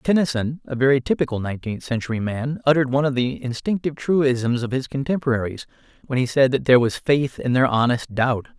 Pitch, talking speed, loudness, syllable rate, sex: 130 Hz, 190 wpm, -21 LUFS, 6.0 syllables/s, male